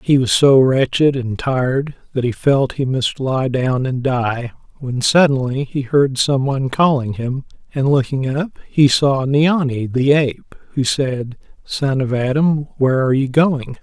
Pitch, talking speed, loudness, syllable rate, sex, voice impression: 135 Hz, 175 wpm, -17 LUFS, 4.2 syllables/s, male, masculine, adult-like, relaxed, slightly weak, slightly hard, raspy, calm, friendly, reassuring, kind, modest